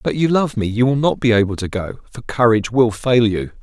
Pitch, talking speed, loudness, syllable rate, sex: 115 Hz, 265 wpm, -17 LUFS, 5.6 syllables/s, male